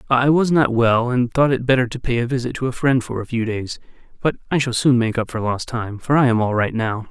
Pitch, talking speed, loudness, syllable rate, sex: 120 Hz, 285 wpm, -19 LUFS, 5.7 syllables/s, male